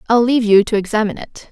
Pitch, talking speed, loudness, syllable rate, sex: 220 Hz, 240 wpm, -15 LUFS, 7.6 syllables/s, female